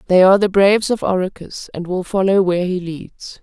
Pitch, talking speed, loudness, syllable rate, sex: 185 Hz, 210 wpm, -16 LUFS, 5.7 syllables/s, female